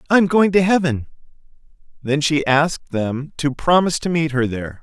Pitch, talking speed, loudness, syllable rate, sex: 150 Hz, 175 wpm, -18 LUFS, 5.2 syllables/s, male